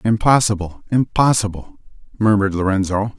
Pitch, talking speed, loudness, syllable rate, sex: 105 Hz, 75 wpm, -17 LUFS, 5.4 syllables/s, male